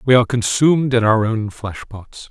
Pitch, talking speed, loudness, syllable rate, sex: 120 Hz, 210 wpm, -16 LUFS, 5.2 syllables/s, male